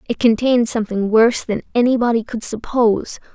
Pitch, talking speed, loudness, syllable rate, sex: 230 Hz, 145 wpm, -17 LUFS, 6.1 syllables/s, female